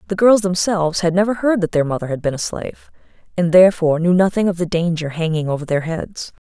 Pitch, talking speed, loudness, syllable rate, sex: 175 Hz, 225 wpm, -17 LUFS, 6.3 syllables/s, female